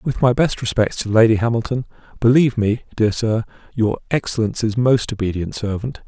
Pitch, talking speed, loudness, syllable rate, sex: 115 Hz, 160 wpm, -19 LUFS, 5.5 syllables/s, male